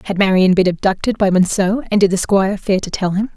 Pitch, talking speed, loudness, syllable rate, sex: 195 Hz, 250 wpm, -15 LUFS, 6.1 syllables/s, female